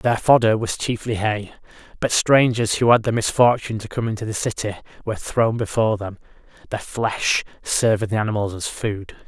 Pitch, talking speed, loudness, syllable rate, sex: 110 Hz, 175 wpm, -20 LUFS, 5.4 syllables/s, male